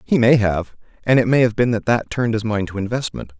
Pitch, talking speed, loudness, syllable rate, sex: 110 Hz, 265 wpm, -18 LUFS, 6.1 syllables/s, male